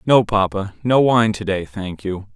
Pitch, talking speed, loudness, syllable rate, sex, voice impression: 105 Hz, 180 wpm, -19 LUFS, 4.3 syllables/s, male, very masculine, very adult-like, very middle-aged, very thick, tensed, slightly powerful, dark, soft, clear, fluent, cool, intellectual, slightly refreshing, sincere, very calm, very mature, very friendly, reassuring, unique, slightly elegant, wild, sweet, kind